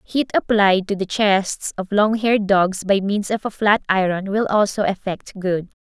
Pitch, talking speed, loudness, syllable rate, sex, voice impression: 200 Hz, 195 wpm, -19 LUFS, 4.4 syllables/s, female, very feminine, very young, very thin, tensed, slightly powerful, very bright, soft, very clear, fluent, very cute, intellectual, very refreshing, sincere, calm, very friendly, very reassuring, unique, very elegant, slightly wild, very sweet, lively, very kind, slightly intense, slightly sharp, light